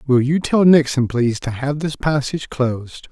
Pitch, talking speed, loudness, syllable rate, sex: 135 Hz, 190 wpm, -18 LUFS, 5.1 syllables/s, male